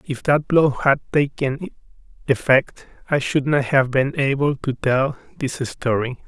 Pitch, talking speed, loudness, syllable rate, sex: 135 Hz, 155 wpm, -20 LUFS, 4.0 syllables/s, male